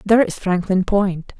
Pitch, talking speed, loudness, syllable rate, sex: 195 Hz, 170 wpm, -18 LUFS, 4.7 syllables/s, female